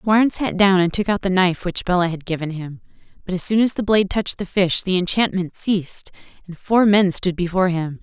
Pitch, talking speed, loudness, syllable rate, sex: 185 Hz, 230 wpm, -19 LUFS, 5.7 syllables/s, female